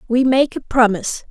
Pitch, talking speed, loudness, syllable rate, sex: 240 Hz, 185 wpm, -16 LUFS, 5.5 syllables/s, female